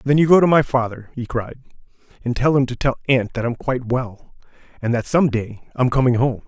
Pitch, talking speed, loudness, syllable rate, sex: 125 Hz, 230 wpm, -19 LUFS, 5.5 syllables/s, male